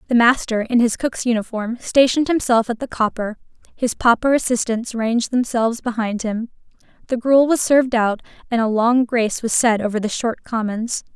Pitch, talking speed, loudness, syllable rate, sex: 235 Hz, 175 wpm, -19 LUFS, 5.3 syllables/s, female